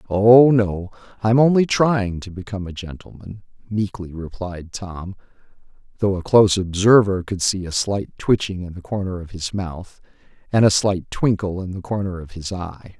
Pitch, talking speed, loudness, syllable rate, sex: 100 Hz, 170 wpm, -20 LUFS, 4.7 syllables/s, male